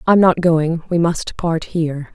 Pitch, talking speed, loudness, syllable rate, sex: 165 Hz, 195 wpm, -17 LUFS, 4.1 syllables/s, female